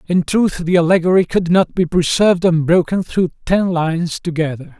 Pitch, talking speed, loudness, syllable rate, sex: 175 Hz, 165 wpm, -16 LUFS, 5.2 syllables/s, male